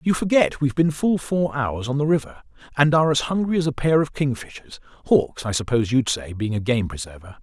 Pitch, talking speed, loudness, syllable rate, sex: 135 Hz, 220 wpm, -21 LUFS, 5.9 syllables/s, male